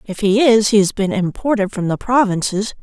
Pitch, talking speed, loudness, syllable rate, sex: 210 Hz, 215 wpm, -16 LUFS, 5.2 syllables/s, female